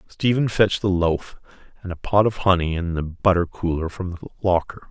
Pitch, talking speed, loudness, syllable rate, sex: 90 Hz, 185 wpm, -21 LUFS, 5.6 syllables/s, male